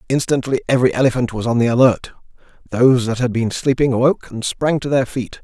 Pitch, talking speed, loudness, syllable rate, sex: 125 Hz, 200 wpm, -17 LUFS, 6.4 syllables/s, male